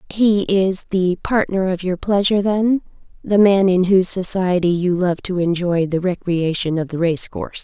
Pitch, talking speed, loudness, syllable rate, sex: 185 Hz, 175 wpm, -18 LUFS, 4.8 syllables/s, female